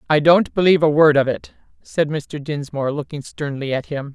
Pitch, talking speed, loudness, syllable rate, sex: 150 Hz, 205 wpm, -19 LUFS, 5.4 syllables/s, female